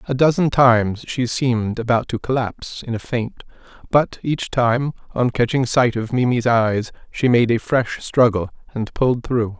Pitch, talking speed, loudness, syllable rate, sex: 120 Hz, 175 wpm, -19 LUFS, 4.6 syllables/s, male